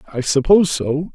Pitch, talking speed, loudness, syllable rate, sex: 155 Hz, 155 wpm, -16 LUFS, 5.6 syllables/s, male